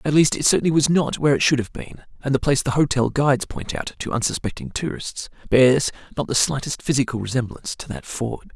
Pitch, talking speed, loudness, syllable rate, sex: 135 Hz, 220 wpm, -21 LUFS, 6.3 syllables/s, male